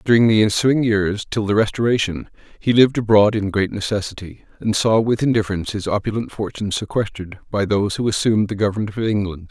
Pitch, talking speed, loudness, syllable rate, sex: 105 Hz, 185 wpm, -19 LUFS, 6.3 syllables/s, male